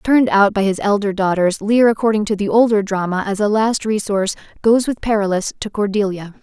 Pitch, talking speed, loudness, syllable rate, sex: 205 Hz, 195 wpm, -17 LUFS, 5.7 syllables/s, female